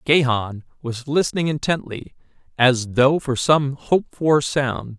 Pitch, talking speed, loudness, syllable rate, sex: 135 Hz, 130 wpm, -20 LUFS, 3.9 syllables/s, male